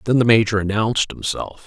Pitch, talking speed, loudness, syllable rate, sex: 110 Hz, 180 wpm, -18 LUFS, 5.9 syllables/s, male